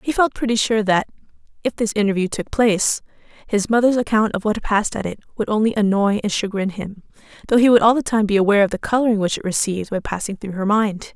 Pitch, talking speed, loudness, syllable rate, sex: 210 Hz, 230 wpm, -19 LUFS, 6.4 syllables/s, female